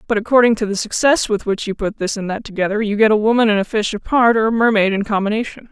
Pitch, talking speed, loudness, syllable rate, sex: 215 Hz, 275 wpm, -17 LUFS, 6.7 syllables/s, female